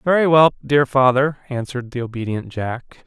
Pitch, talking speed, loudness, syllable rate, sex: 130 Hz, 155 wpm, -18 LUFS, 5.0 syllables/s, male